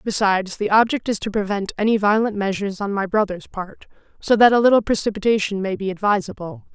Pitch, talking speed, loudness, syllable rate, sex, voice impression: 205 Hz, 185 wpm, -19 LUFS, 6.1 syllables/s, female, feminine, slightly adult-like, slightly intellectual, calm, slightly kind